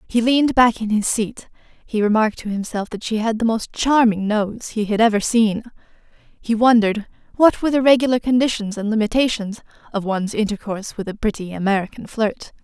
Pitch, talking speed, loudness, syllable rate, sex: 220 Hz, 180 wpm, -19 LUFS, 5.8 syllables/s, female